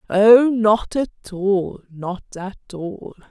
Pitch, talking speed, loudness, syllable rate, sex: 205 Hz, 125 wpm, -18 LUFS, 3.0 syllables/s, female